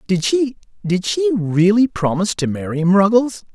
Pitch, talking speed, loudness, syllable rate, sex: 190 Hz, 150 wpm, -17 LUFS, 5.2 syllables/s, male